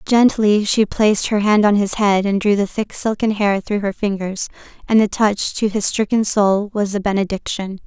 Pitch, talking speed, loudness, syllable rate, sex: 205 Hz, 205 wpm, -17 LUFS, 4.8 syllables/s, female